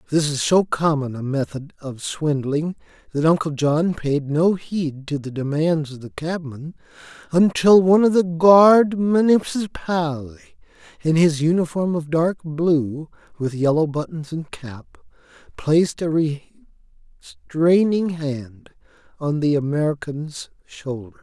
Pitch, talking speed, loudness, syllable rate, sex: 155 Hz, 125 wpm, -20 LUFS, 4.1 syllables/s, male